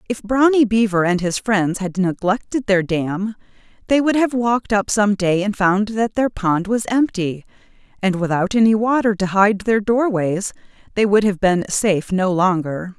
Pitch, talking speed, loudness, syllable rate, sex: 205 Hz, 180 wpm, -18 LUFS, 4.6 syllables/s, female